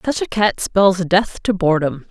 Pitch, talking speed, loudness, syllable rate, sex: 195 Hz, 200 wpm, -17 LUFS, 4.5 syllables/s, female